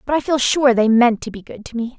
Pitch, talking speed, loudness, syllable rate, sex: 245 Hz, 330 wpm, -16 LUFS, 5.9 syllables/s, female